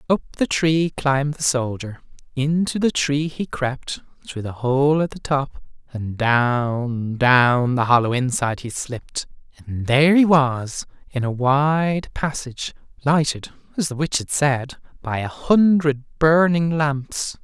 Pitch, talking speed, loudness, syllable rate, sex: 140 Hz, 150 wpm, -20 LUFS, 3.9 syllables/s, male